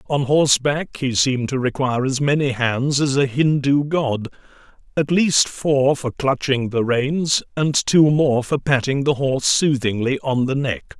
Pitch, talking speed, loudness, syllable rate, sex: 135 Hz, 170 wpm, -19 LUFS, 4.3 syllables/s, male